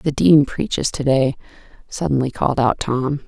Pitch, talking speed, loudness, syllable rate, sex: 140 Hz, 165 wpm, -18 LUFS, 4.8 syllables/s, female